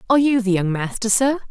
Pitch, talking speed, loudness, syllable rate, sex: 225 Hz, 240 wpm, -19 LUFS, 6.5 syllables/s, female